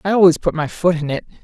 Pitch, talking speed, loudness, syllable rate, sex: 170 Hz, 295 wpm, -17 LUFS, 6.8 syllables/s, female